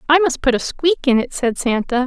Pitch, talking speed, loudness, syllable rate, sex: 270 Hz, 260 wpm, -17 LUFS, 5.5 syllables/s, female